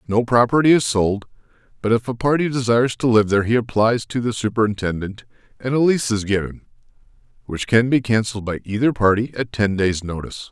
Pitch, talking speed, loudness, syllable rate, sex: 115 Hz, 190 wpm, -19 LUFS, 6.0 syllables/s, male